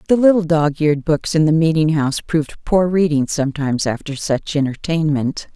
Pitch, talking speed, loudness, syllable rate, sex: 155 Hz, 175 wpm, -17 LUFS, 5.6 syllables/s, female